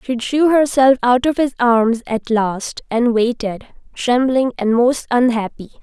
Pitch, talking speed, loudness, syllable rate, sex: 245 Hz, 155 wpm, -16 LUFS, 4.0 syllables/s, female